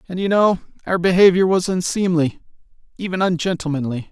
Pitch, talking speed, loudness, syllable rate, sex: 175 Hz, 130 wpm, -18 LUFS, 5.8 syllables/s, male